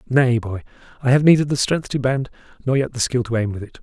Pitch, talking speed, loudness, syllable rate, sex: 125 Hz, 265 wpm, -19 LUFS, 6.2 syllables/s, male